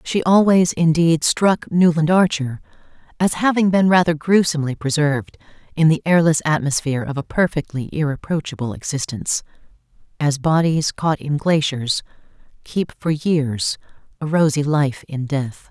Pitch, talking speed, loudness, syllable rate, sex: 155 Hz, 130 wpm, -19 LUFS, 4.8 syllables/s, female